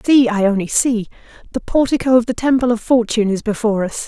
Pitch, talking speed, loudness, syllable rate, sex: 230 Hz, 175 wpm, -16 LUFS, 5.8 syllables/s, female